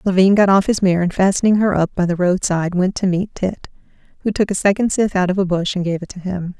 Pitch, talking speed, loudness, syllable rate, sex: 190 Hz, 275 wpm, -17 LUFS, 6.3 syllables/s, female